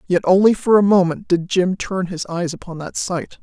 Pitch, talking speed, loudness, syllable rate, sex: 180 Hz, 230 wpm, -18 LUFS, 4.9 syllables/s, female